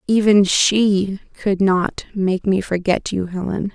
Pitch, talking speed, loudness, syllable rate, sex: 195 Hz, 145 wpm, -18 LUFS, 3.7 syllables/s, female